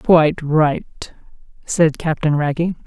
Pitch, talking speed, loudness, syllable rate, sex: 155 Hz, 105 wpm, -17 LUFS, 3.5 syllables/s, female